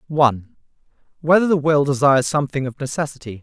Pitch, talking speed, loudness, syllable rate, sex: 140 Hz, 140 wpm, -18 LUFS, 7.3 syllables/s, male